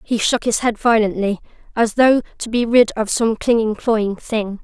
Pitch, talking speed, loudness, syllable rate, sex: 220 Hz, 180 wpm, -17 LUFS, 4.5 syllables/s, female